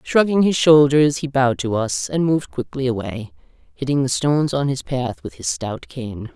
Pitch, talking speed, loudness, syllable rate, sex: 135 Hz, 200 wpm, -19 LUFS, 4.8 syllables/s, female